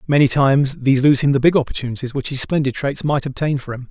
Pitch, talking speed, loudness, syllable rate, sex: 135 Hz, 245 wpm, -18 LUFS, 6.7 syllables/s, male